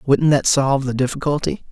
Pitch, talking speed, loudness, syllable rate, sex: 140 Hz, 175 wpm, -18 LUFS, 5.5 syllables/s, male